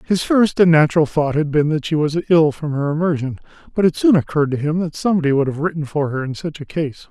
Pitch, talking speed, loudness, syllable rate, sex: 155 Hz, 260 wpm, -18 LUFS, 6.3 syllables/s, male